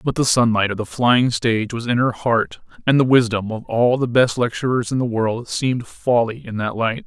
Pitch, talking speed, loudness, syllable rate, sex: 120 Hz, 230 wpm, -19 LUFS, 5.1 syllables/s, male